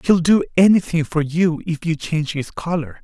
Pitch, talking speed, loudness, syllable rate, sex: 160 Hz, 200 wpm, -18 LUFS, 5.1 syllables/s, male